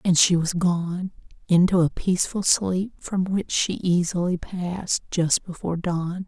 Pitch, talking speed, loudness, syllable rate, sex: 180 Hz, 145 wpm, -23 LUFS, 4.2 syllables/s, female